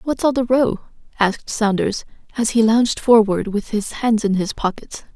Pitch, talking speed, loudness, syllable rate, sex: 220 Hz, 185 wpm, -18 LUFS, 4.9 syllables/s, female